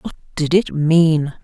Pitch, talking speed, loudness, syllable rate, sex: 160 Hz, 165 wpm, -16 LUFS, 3.4 syllables/s, female